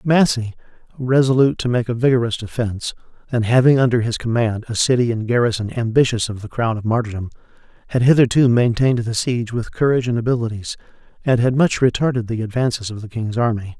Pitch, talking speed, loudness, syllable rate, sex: 120 Hz, 180 wpm, -18 LUFS, 6.3 syllables/s, male